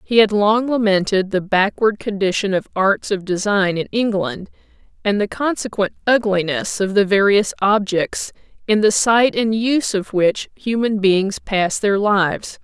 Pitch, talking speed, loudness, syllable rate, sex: 205 Hz, 155 wpm, -18 LUFS, 4.4 syllables/s, female